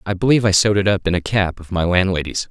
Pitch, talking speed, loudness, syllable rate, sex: 95 Hz, 290 wpm, -17 LUFS, 7.1 syllables/s, male